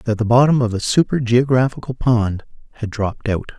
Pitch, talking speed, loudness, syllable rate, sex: 120 Hz, 185 wpm, -17 LUFS, 5.4 syllables/s, male